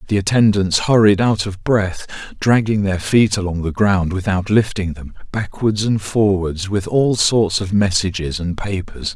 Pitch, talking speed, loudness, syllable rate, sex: 100 Hz, 165 wpm, -17 LUFS, 4.4 syllables/s, male